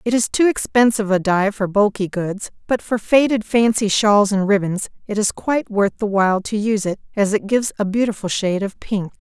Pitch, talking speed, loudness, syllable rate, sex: 210 Hz, 215 wpm, -18 LUFS, 5.5 syllables/s, female